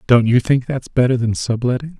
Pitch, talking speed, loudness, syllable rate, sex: 120 Hz, 210 wpm, -17 LUFS, 5.4 syllables/s, male